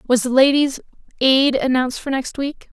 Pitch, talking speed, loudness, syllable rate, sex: 265 Hz, 170 wpm, -18 LUFS, 4.3 syllables/s, female